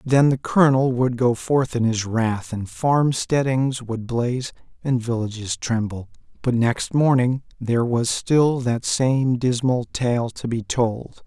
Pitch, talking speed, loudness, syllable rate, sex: 125 Hz, 155 wpm, -21 LUFS, 3.9 syllables/s, male